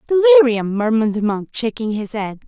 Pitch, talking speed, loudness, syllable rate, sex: 240 Hz, 170 wpm, -17 LUFS, 7.3 syllables/s, female